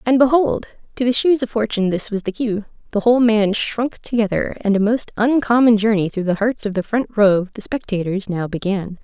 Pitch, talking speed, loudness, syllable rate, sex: 220 Hz, 210 wpm, -18 LUFS, 5.4 syllables/s, female